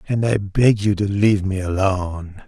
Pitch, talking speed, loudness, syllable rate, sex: 100 Hz, 195 wpm, -19 LUFS, 4.7 syllables/s, male